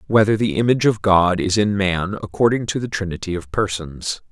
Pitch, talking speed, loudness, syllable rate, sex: 100 Hz, 195 wpm, -19 LUFS, 5.4 syllables/s, male